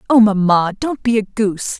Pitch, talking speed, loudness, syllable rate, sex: 210 Hz, 200 wpm, -16 LUFS, 5.3 syllables/s, female